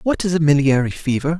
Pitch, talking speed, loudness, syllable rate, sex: 155 Hz, 215 wpm, -17 LUFS, 6.2 syllables/s, male